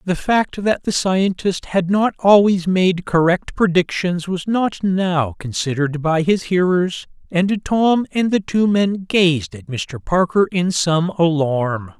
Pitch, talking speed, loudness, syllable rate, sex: 180 Hz, 155 wpm, -18 LUFS, 3.7 syllables/s, male